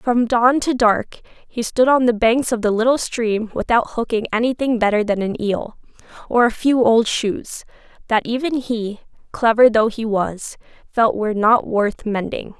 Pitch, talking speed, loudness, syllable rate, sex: 230 Hz, 175 wpm, -18 LUFS, 4.4 syllables/s, female